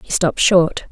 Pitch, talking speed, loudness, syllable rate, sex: 175 Hz, 195 wpm, -15 LUFS, 5.3 syllables/s, female